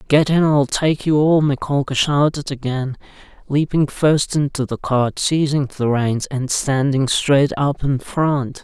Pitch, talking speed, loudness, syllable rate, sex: 140 Hz, 160 wpm, -18 LUFS, 4.0 syllables/s, male